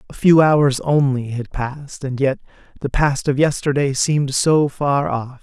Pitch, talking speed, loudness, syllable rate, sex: 140 Hz, 175 wpm, -18 LUFS, 4.4 syllables/s, male